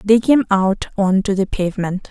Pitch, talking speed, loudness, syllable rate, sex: 200 Hz, 200 wpm, -17 LUFS, 4.8 syllables/s, female